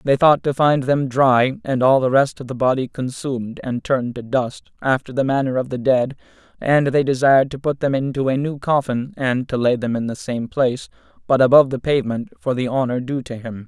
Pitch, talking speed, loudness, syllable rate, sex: 130 Hz, 230 wpm, -19 LUFS, 5.5 syllables/s, male